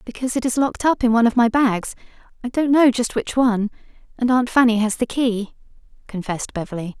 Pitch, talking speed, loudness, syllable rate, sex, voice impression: 235 Hz, 190 wpm, -19 LUFS, 6.3 syllables/s, female, feminine, slightly adult-like, slightly cute, friendly, kind